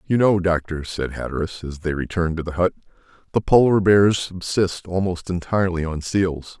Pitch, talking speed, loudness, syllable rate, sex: 90 Hz, 175 wpm, -21 LUFS, 5.1 syllables/s, male